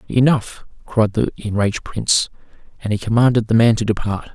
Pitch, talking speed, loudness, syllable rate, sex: 110 Hz, 165 wpm, -18 LUFS, 5.5 syllables/s, male